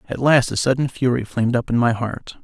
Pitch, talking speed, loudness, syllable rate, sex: 120 Hz, 245 wpm, -19 LUFS, 5.7 syllables/s, male